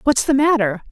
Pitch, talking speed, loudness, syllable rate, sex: 255 Hz, 200 wpm, -16 LUFS, 5.4 syllables/s, female